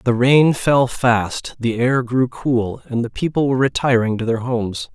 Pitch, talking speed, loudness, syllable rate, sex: 125 Hz, 195 wpm, -18 LUFS, 4.4 syllables/s, male